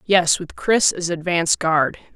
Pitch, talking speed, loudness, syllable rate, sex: 170 Hz, 165 wpm, -19 LUFS, 4.2 syllables/s, female